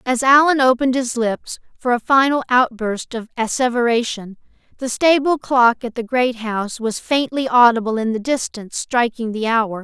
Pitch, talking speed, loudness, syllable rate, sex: 240 Hz, 165 wpm, -18 LUFS, 4.9 syllables/s, female